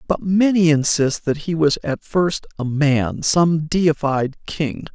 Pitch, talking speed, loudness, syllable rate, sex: 155 Hz, 160 wpm, -19 LUFS, 3.6 syllables/s, male